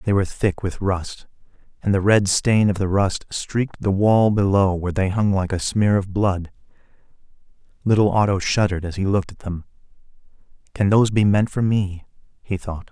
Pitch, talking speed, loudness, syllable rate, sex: 100 Hz, 185 wpm, -20 LUFS, 5.3 syllables/s, male